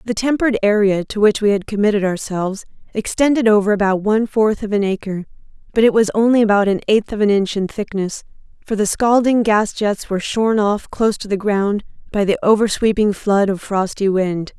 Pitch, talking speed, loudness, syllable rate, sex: 210 Hz, 195 wpm, -17 LUFS, 5.6 syllables/s, female